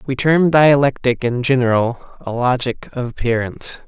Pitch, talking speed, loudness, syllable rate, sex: 125 Hz, 140 wpm, -17 LUFS, 5.1 syllables/s, male